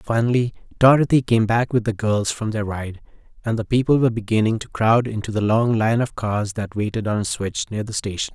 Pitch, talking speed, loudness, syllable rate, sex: 110 Hz, 225 wpm, -20 LUFS, 5.6 syllables/s, male